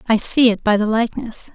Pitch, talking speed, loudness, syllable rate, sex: 220 Hz, 235 wpm, -16 LUFS, 5.9 syllables/s, female